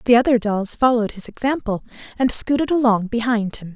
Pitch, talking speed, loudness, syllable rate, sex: 235 Hz, 175 wpm, -19 LUFS, 5.8 syllables/s, female